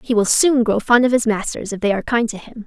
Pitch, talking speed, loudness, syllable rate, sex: 225 Hz, 315 wpm, -17 LUFS, 6.2 syllables/s, female